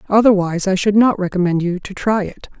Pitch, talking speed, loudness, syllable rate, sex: 195 Hz, 210 wpm, -16 LUFS, 6.0 syllables/s, female